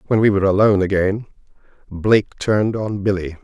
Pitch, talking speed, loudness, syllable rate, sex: 100 Hz, 155 wpm, -18 LUFS, 6.2 syllables/s, male